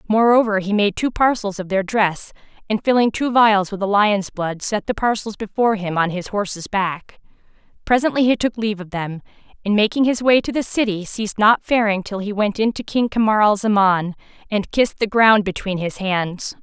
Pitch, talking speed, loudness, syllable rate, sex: 210 Hz, 205 wpm, -18 LUFS, 5.2 syllables/s, female